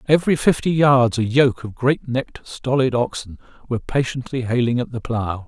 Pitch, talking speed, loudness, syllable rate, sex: 125 Hz, 175 wpm, -20 LUFS, 5.2 syllables/s, male